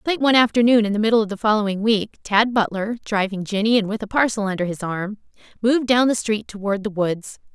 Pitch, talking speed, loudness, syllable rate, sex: 215 Hz, 225 wpm, -20 LUFS, 6.1 syllables/s, female